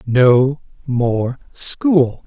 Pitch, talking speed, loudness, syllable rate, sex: 135 Hz, 80 wpm, -16 LUFS, 1.7 syllables/s, male